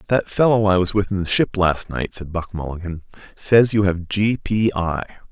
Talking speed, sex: 190 wpm, male